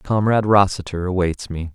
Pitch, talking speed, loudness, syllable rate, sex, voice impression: 95 Hz, 135 wpm, -19 LUFS, 5.3 syllables/s, male, masculine, adult-like, tensed, powerful, bright, clear, cool, intellectual, calm, friendly, reassuring, slightly wild, lively, kind